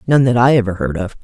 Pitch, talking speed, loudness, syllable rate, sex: 115 Hz, 290 wpm, -14 LUFS, 6.7 syllables/s, female